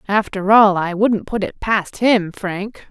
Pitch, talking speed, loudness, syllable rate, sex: 200 Hz, 185 wpm, -17 LUFS, 3.6 syllables/s, female